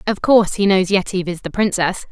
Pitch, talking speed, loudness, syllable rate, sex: 190 Hz, 225 wpm, -17 LUFS, 6.1 syllables/s, female